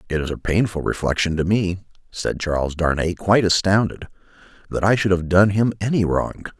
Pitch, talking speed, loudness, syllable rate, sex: 90 Hz, 180 wpm, -20 LUFS, 5.7 syllables/s, male